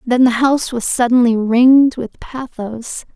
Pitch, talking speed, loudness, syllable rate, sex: 250 Hz, 150 wpm, -14 LUFS, 4.4 syllables/s, female